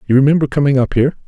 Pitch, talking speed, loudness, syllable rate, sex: 140 Hz, 235 wpm, -14 LUFS, 8.9 syllables/s, male